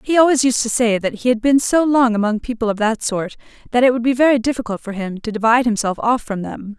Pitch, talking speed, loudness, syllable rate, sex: 235 Hz, 265 wpm, -17 LUFS, 6.2 syllables/s, female